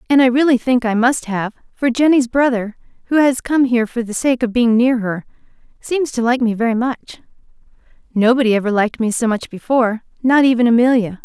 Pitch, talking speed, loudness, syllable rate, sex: 240 Hz, 200 wpm, -16 LUFS, 5.9 syllables/s, female